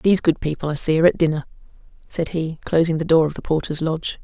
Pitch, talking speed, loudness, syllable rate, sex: 160 Hz, 240 wpm, -20 LUFS, 6.8 syllables/s, female